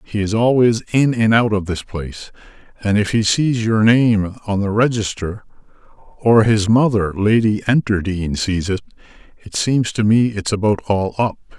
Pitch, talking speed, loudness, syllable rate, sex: 105 Hz, 160 wpm, -17 LUFS, 4.6 syllables/s, male